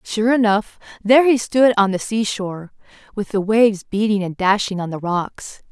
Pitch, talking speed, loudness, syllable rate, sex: 210 Hz, 190 wpm, -18 LUFS, 4.9 syllables/s, female